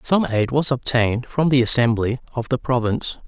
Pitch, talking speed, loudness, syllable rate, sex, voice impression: 125 Hz, 185 wpm, -20 LUFS, 5.4 syllables/s, male, masculine, slightly young, adult-like, slightly thick, tensed, slightly weak, bright, soft, very clear, very fluent, slightly cool, very intellectual, slightly refreshing, sincere, calm, slightly mature, friendly, reassuring, elegant, slightly sweet, lively, kind